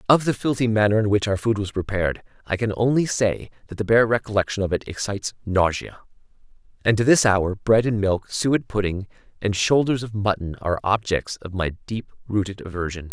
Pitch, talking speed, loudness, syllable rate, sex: 105 Hz, 190 wpm, -22 LUFS, 5.5 syllables/s, male